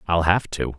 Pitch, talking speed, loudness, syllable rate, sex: 85 Hz, 230 wpm, -21 LUFS, 4.8 syllables/s, male